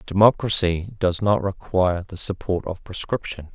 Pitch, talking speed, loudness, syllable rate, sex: 95 Hz, 135 wpm, -22 LUFS, 4.8 syllables/s, male